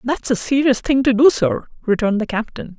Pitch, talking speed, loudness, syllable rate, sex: 240 Hz, 215 wpm, -17 LUFS, 5.5 syllables/s, female